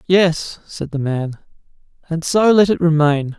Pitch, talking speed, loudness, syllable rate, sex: 165 Hz, 160 wpm, -17 LUFS, 4.0 syllables/s, male